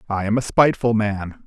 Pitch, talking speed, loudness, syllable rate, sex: 110 Hz, 205 wpm, -19 LUFS, 5.4 syllables/s, male